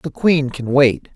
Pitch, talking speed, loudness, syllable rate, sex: 140 Hz, 210 wpm, -16 LUFS, 3.7 syllables/s, male